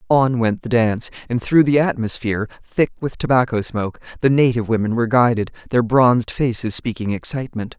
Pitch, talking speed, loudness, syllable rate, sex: 120 Hz, 155 wpm, -19 LUFS, 6.0 syllables/s, female